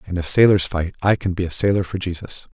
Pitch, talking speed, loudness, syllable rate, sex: 90 Hz, 260 wpm, -19 LUFS, 6.1 syllables/s, male